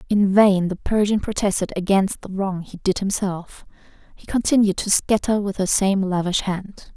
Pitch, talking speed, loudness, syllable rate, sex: 195 Hz, 170 wpm, -20 LUFS, 4.7 syllables/s, female